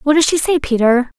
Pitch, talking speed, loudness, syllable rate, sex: 280 Hz, 255 wpm, -14 LUFS, 5.8 syllables/s, female